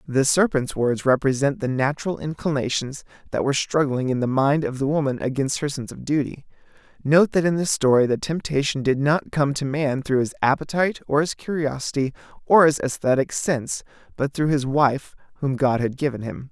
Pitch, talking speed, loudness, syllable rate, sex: 140 Hz, 190 wpm, -22 LUFS, 5.5 syllables/s, male